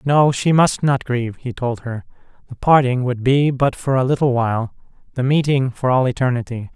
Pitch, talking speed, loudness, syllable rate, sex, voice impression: 130 Hz, 195 wpm, -18 LUFS, 5.2 syllables/s, male, very masculine, slightly adult-like, middle-aged, thick, tensed, slightly powerful, bright, hard, soft, slightly clear, slightly fluent, cool, very intellectual, slightly refreshing, sincere, calm, mature, friendly, reassuring, unique, elegant, wild, slightly sweet, lively, kind, very modest